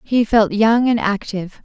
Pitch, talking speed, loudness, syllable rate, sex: 215 Hz, 185 wpm, -16 LUFS, 4.6 syllables/s, female